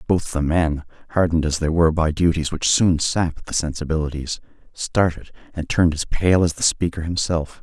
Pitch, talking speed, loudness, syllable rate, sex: 80 Hz, 180 wpm, -21 LUFS, 5.3 syllables/s, male